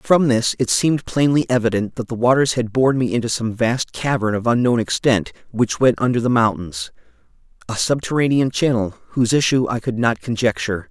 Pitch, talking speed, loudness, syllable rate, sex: 120 Hz, 175 wpm, -19 LUFS, 5.5 syllables/s, male